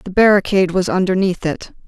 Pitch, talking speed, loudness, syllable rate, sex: 185 Hz, 160 wpm, -16 LUFS, 6.0 syllables/s, female